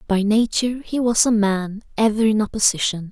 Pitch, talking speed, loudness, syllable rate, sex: 215 Hz, 175 wpm, -19 LUFS, 5.3 syllables/s, female